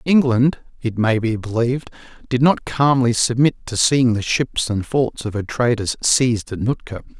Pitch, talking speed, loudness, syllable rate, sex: 120 Hz, 175 wpm, -19 LUFS, 4.6 syllables/s, male